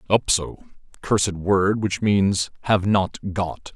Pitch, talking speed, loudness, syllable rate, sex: 95 Hz, 130 wpm, -21 LUFS, 3.3 syllables/s, male